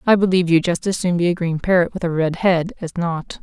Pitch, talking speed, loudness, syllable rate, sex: 175 Hz, 280 wpm, -19 LUFS, 6.0 syllables/s, female